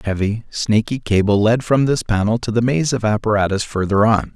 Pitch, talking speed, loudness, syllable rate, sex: 110 Hz, 205 wpm, -17 LUFS, 5.4 syllables/s, male